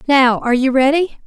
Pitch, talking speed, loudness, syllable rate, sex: 270 Hz, 190 wpm, -14 LUFS, 5.6 syllables/s, female